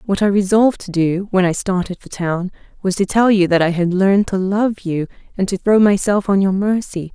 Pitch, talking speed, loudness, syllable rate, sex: 190 Hz, 235 wpm, -17 LUFS, 5.4 syllables/s, female